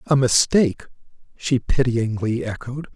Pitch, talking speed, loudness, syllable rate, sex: 125 Hz, 100 wpm, -21 LUFS, 4.3 syllables/s, male